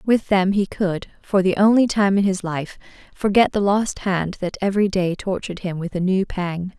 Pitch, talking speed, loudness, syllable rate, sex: 190 Hz, 210 wpm, -20 LUFS, 4.9 syllables/s, female